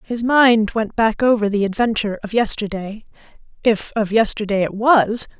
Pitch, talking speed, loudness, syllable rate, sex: 220 Hz, 155 wpm, -18 LUFS, 4.8 syllables/s, female